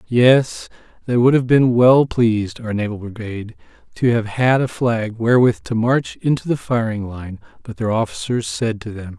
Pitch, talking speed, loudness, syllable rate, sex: 115 Hz, 185 wpm, -18 LUFS, 4.7 syllables/s, male